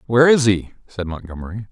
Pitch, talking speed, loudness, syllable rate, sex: 105 Hz, 175 wpm, -17 LUFS, 6.4 syllables/s, male